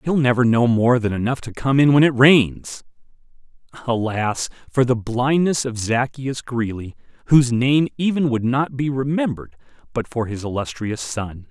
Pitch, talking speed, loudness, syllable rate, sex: 125 Hz, 160 wpm, -19 LUFS, 4.7 syllables/s, male